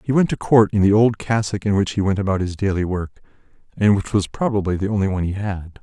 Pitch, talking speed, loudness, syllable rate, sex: 100 Hz, 255 wpm, -19 LUFS, 6.3 syllables/s, male